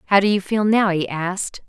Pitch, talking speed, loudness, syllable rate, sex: 195 Hz, 250 wpm, -19 LUFS, 5.5 syllables/s, female